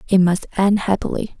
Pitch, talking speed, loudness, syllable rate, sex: 190 Hz, 170 wpm, -18 LUFS, 5.3 syllables/s, female